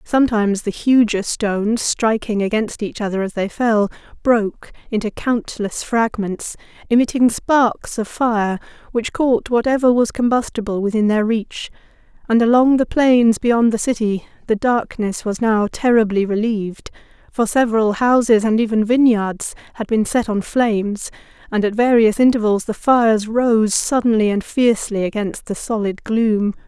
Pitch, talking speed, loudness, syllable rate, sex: 225 Hz, 145 wpm, -17 LUFS, 4.6 syllables/s, female